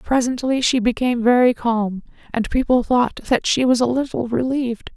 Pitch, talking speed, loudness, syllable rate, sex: 245 Hz, 170 wpm, -19 LUFS, 5.0 syllables/s, female